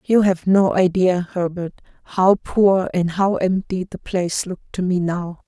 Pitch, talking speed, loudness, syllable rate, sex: 185 Hz, 175 wpm, -19 LUFS, 4.4 syllables/s, female